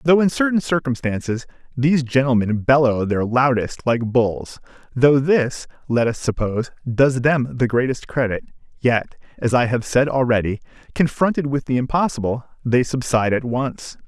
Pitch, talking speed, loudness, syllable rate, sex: 130 Hz, 150 wpm, -19 LUFS, 4.8 syllables/s, male